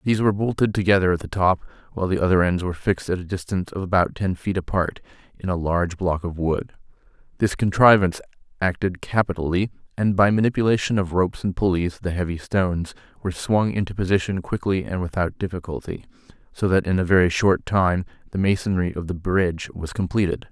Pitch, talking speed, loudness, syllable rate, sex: 95 Hz, 185 wpm, -22 LUFS, 6.2 syllables/s, male